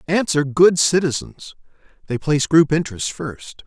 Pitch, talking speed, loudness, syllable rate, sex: 155 Hz, 145 wpm, -18 LUFS, 5.1 syllables/s, male